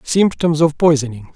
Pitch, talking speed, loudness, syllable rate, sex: 155 Hz, 135 wpm, -15 LUFS, 4.8 syllables/s, male